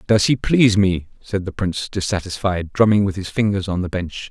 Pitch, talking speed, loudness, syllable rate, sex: 95 Hz, 210 wpm, -19 LUFS, 5.5 syllables/s, male